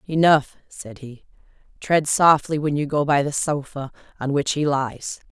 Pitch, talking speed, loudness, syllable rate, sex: 145 Hz, 170 wpm, -20 LUFS, 4.3 syllables/s, female